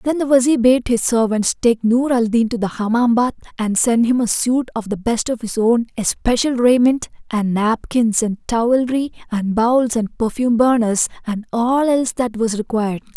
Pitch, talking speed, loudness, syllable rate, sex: 235 Hz, 190 wpm, -17 LUFS, 4.8 syllables/s, female